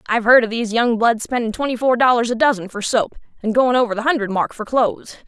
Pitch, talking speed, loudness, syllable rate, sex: 230 Hz, 250 wpm, -18 LUFS, 6.5 syllables/s, female